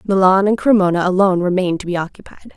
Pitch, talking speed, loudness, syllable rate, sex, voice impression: 190 Hz, 190 wpm, -15 LUFS, 6.9 syllables/s, female, feminine, adult-like, tensed, clear, fluent, intellectual, friendly, elegant, lively, slightly kind